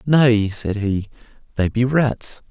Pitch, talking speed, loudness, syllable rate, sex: 115 Hz, 145 wpm, -19 LUFS, 3.2 syllables/s, male